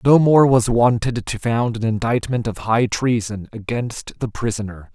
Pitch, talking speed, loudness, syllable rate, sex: 115 Hz, 170 wpm, -19 LUFS, 4.4 syllables/s, male